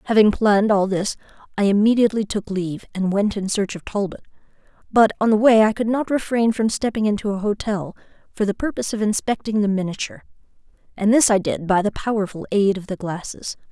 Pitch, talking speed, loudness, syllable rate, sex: 205 Hz, 195 wpm, -20 LUFS, 6.1 syllables/s, female